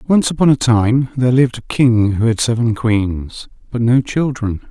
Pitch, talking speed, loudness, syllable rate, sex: 120 Hz, 190 wpm, -15 LUFS, 4.5 syllables/s, male